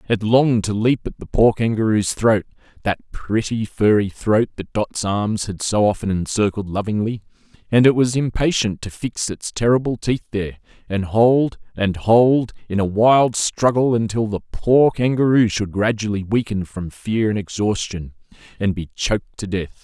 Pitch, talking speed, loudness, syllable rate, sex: 110 Hz, 165 wpm, -19 LUFS, 4.7 syllables/s, male